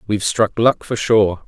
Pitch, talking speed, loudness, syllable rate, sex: 105 Hz, 205 wpm, -17 LUFS, 4.7 syllables/s, male